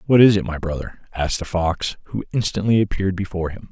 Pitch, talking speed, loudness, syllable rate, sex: 95 Hz, 210 wpm, -21 LUFS, 6.6 syllables/s, male